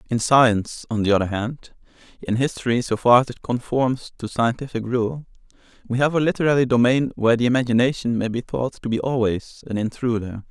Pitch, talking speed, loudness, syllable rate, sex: 120 Hz, 185 wpm, -21 LUFS, 5.7 syllables/s, male